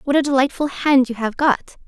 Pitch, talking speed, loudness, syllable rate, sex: 265 Hz, 225 wpm, -18 LUFS, 5.6 syllables/s, female